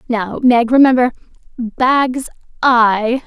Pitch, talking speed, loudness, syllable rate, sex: 245 Hz, 75 wpm, -13 LUFS, 3.1 syllables/s, female